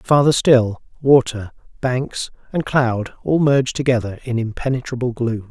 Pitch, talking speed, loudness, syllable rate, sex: 125 Hz, 130 wpm, -19 LUFS, 4.5 syllables/s, male